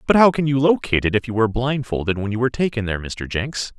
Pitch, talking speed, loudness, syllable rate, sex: 120 Hz, 270 wpm, -20 LUFS, 6.9 syllables/s, male